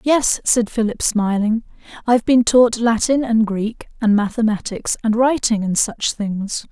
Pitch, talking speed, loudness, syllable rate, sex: 225 Hz, 150 wpm, -18 LUFS, 4.2 syllables/s, female